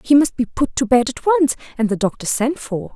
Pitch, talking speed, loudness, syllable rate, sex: 240 Hz, 265 wpm, -18 LUFS, 5.4 syllables/s, female